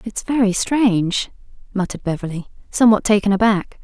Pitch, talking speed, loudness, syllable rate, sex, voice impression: 205 Hz, 125 wpm, -18 LUFS, 5.8 syllables/s, female, feminine, slightly adult-like, slightly cute, friendly, kind